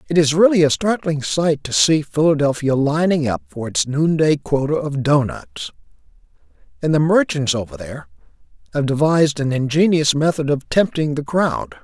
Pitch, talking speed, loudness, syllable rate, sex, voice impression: 155 Hz, 155 wpm, -18 LUFS, 5.0 syllables/s, male, masculine, middle-aged, slightly weak, slightly muffled, sincere, calm, mature, reassuring, slightly wild, kind, slightly modest